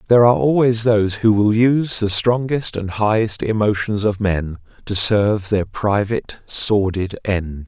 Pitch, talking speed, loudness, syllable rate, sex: 105 Hz, 155 wpm, -18 LUFS, 4.6 syllables/s, male